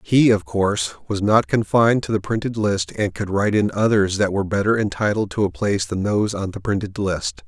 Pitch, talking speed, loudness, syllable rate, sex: 105 Hz, 225 wpm, -20 LUFS, 5.7 syllables/s, male